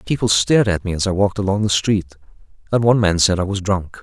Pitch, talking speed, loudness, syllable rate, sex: 95 Hz, 255 wpm, -17 LUFS, 6.8 syllables/s, male